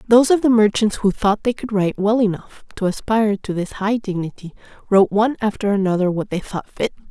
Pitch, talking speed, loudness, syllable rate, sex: 205 Hz, 210 wpm, -19 LUFS, 6.1 syllables/s, female